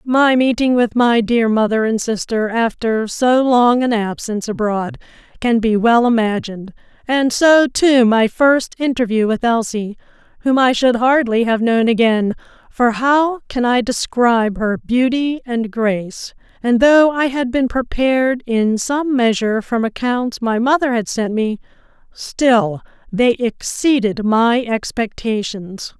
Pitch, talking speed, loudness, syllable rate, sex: 235 Hz, 145 wpm, -16 LUFS, 4.0 syllables/s, female